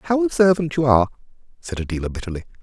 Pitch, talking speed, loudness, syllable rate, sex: 120 Hz, 160 wpm, -20 LUFS, 8.0 syllables/s, male